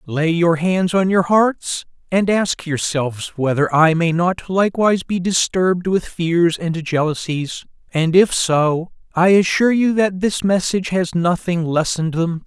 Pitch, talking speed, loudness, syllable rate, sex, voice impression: 175 Hz, 160 wpm, -17 LUFS, 4.3 syllables/s, male, masculine, adult-like, tensed, powerful, bright, soft, slightly raspy, slightly refreshing, friendly, unique, lively, intense